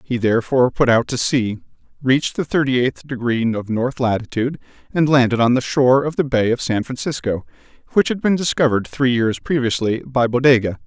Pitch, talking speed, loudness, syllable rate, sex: 125 Hz, 190 wpm, -18 LUFS, 5.7 syllables/s, male